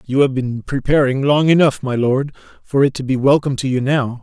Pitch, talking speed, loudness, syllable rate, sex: 135 Hz, 225 wpm, -16 LUFS, 5.5 syllables/s, male